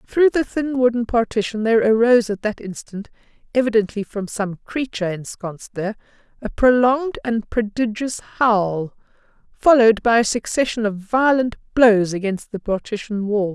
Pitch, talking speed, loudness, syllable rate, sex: 225 Hz, 140 wpm, -19 LUFS, 5.0 syllables/s, female